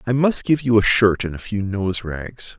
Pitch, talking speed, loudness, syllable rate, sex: 105 Hz, 230 wpm, -19 LUFS, 4.9 syllables/s, male